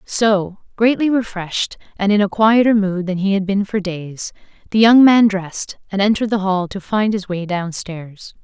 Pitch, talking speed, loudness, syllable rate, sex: 200 Hz, 190 wpm, -17 LUFS, 4.7 syllables/s, female